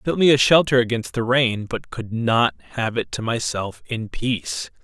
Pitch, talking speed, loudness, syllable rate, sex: 115 Hz, 200 wpm, -21 LUFS, 4.6 syllables/s, male